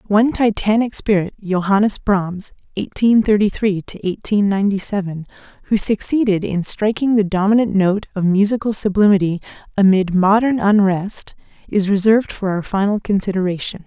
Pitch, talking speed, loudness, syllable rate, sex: 200 Hz, 135 wpm, -17 LUFS, 4.3 syllables/s, female